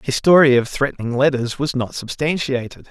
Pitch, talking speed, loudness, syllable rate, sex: 135 Hz, 165 wpm, -18 LUFS, 5.4 syllables/s, male